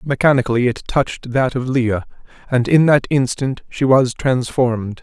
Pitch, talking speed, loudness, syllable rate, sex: 130 Hz, 155 wpm, -17 LUFS, 5.0 syllables/s, male